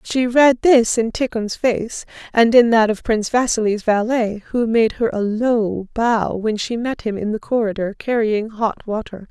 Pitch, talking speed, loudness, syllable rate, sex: 225 Hz, 185 wpm, -18 LUFS, 4.4 syllables/s, female